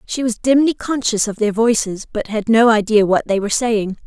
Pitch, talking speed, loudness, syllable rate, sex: 220 Hz, 220 wpm, -16 LUFS, 5.3 syllables/s, female